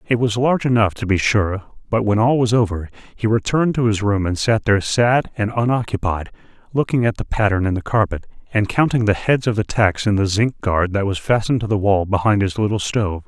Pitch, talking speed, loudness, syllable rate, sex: 110 Hz, 230 wpm, -18 LUFS, 5.7 syllables/s, male